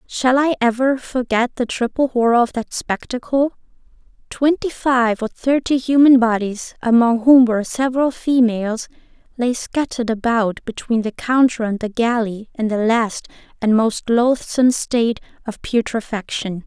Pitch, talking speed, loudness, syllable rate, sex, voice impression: 240 Hz, 140 wpm, -18 LUFS, 4.6 syllables/s, female, feminine, slightly young, tensed, slightly bright, soft, cute, calm, friendly, reassuring, sweet, kind, modest